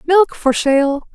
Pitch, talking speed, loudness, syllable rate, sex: 305 Hz, 155 wpm, -15 LUFS, 3.1 syllables/s, female